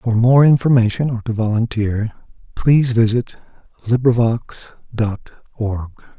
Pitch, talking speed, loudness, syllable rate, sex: 115 Hz, 105 wpm, -17 LUFS, 4.5 syllables/s, male